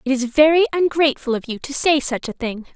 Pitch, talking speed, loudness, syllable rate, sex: 275 Hz, 240 wpm, -18 LUFS, 6.1 syllables/s, female